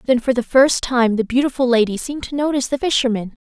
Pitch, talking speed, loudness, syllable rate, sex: 250 Hz, 225 wpm, -18 LUFS, 6.6 syllables/s, female